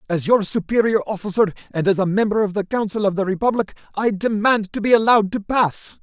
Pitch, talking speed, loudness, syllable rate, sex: 205 Hz, 210 wpm, -19 LUFS, 6.0 syllables/s, male